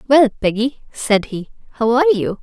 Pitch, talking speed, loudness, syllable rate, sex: 245 Hz, 175 wpm, -16 LUFS, 5.1 syllables/s, female